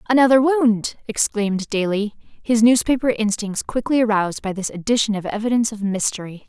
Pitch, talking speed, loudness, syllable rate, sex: 220 Hz, 150 wpm, -19 LUFS, 5.8 syllables/s, female